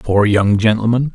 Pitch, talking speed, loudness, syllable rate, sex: 110 Hz, 160 wpm, -14 LUFS, 4.5 syllables/s, male